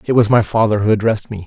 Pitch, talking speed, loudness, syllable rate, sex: 110 Hz, 285 wpm, -15 LUFS, 7.3 syllables/s, male